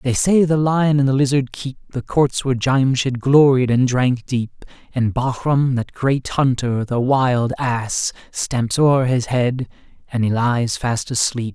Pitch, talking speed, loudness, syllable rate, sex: 130 Hz, 165 wpm, -18 LUFS, 4.0 syllables/s, male